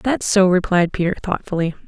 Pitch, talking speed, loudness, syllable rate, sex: 185 Hz, 160 wpm, -18 LUFS, 5.4 syllables/s, female